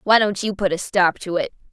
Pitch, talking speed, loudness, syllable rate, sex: 200 Hz, 280 wpm, -20 LUFS, 5.5 syllables/s, female